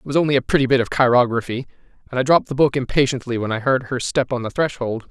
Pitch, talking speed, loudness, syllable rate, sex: 130 Hz, 260 wpm, -19 LUFS, 7.0 syllables/s, male